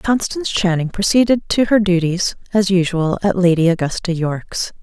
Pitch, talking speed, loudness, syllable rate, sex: 185 Hz, 150 wpm, -17 LUFS, 5.1 syllables/s, female